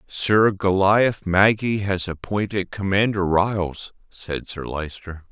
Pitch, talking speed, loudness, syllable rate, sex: 95 Hz, 115 wpm, -21 LUFS, 3.6 syllables/s, male